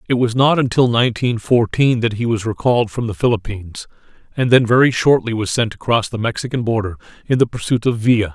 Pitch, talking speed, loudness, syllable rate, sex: 115 Hz, 200 wpm, -17 LUFS, 6.0 syllables/s, male